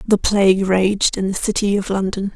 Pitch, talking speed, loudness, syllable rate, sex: 195 Hz, 205 wpm, -17 LUFS, 5.0 syllables/s, female